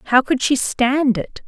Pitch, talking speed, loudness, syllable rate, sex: 255 Hz, 205 wpm, -18 LUFS, 3.5 syllables/s, female